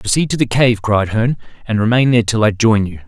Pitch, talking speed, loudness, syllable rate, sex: 110 Hz, 255 wpm, -15 LUFS, 6.3 syllables/s, male